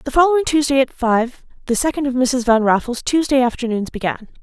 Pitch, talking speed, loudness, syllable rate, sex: 255 Hz, 190 wpm, -18 LUFS, 5.7 syllables/s, female